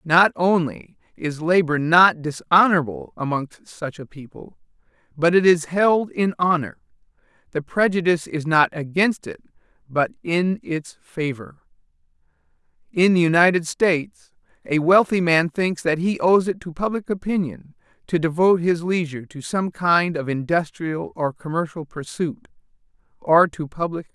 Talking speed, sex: 140 wpm, male